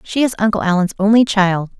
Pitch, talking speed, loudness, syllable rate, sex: 200 Hz, 200 wpm, -15 LUFS, 5.6 syllables/s, female